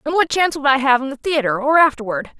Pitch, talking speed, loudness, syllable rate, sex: 275 Hz, 275 wpm, -17 LUFS, 6.7 syllables/s, female